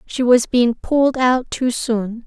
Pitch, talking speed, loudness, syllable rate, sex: 245 Hz, 185 wpm, -17 LUFS, 3.8 syllables/s, female